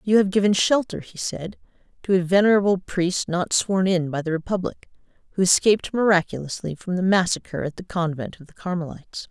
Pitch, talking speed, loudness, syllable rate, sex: 185 Hz, 180 wpm, -22 LUFS, 5.7 syllables/s, female